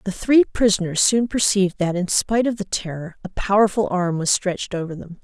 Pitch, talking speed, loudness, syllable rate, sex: 195 Hz, 205 wpm, -20 LUFS, 5.5 syllables/s, female